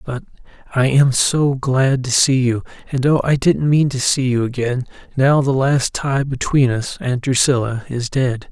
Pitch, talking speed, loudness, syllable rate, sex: 130 Hz, 175 wpm, -17 LUFS, 4.3 syllables/s, male